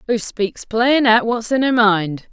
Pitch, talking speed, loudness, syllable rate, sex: 225 Hz, 205 wpm, -16 LUFS, 3.9 syllables/s, female